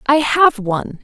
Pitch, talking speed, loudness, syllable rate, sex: 250 Hz, 175 wpm, -15 LUFS, 4.4 syllables/s, female